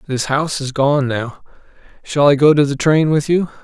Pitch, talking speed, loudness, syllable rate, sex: 145 Hz, 215 wpm, -15 LUFS, 5.1 syllables/s, male